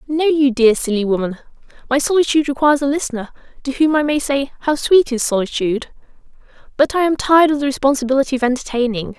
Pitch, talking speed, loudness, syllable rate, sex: 270 Hz, 185 wpm, -16 LUFS, 6.7 syllables/s, female